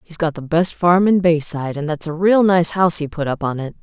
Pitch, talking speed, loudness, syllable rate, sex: 165 Hz, 285 wpm, -17 LUFS, 5.7 syllables/s, female